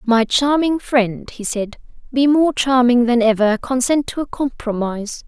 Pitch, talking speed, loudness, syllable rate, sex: 250 Hz, 150 wpm, -17 LUFS, 4.4 syllables/s, female